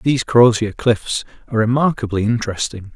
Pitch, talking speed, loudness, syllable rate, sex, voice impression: 115 Hz, 120 wpm, -17 LUFS, 5.6 syllables/s, male, masculine, adult-like, relaxed, slightly weak, slightly dark, clear, raspy, cool, intellectual, calm, friendly, wild, lively, slightly kind